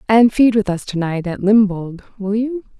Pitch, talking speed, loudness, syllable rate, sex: 210 Hz, 215 wpm, -17 LUFS, 4.7 syllables/s, female